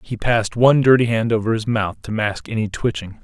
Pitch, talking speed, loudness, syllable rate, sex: 110 Hz, 225 wpm, -18 LUFS, 5.8 syllables/s, male